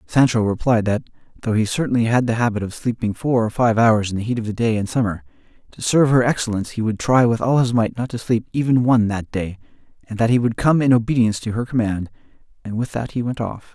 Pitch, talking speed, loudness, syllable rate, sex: 115 Hz, 250 wpm, -19 LUFS, 6.3 syllables/s, male